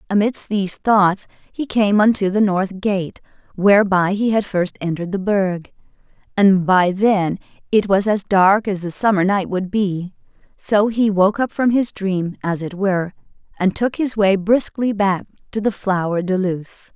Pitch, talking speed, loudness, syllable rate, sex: 195 Hz, 175 wpm, -18 LUFS, 4.3 syllables/s, female